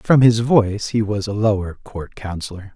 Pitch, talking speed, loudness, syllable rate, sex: 105 Hz, 195 wpm, -19 LUFS, 4.9 syllables/s, male